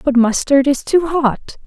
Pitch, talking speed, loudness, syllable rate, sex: 280 Hz, 180 wpm, -15 LUFS, 4.0 syllables/s, female